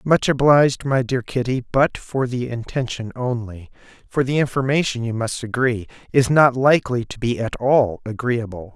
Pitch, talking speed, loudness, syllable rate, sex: 125 Hz, 160 wpm, -20 LUFS, 4.9 syllables/s, male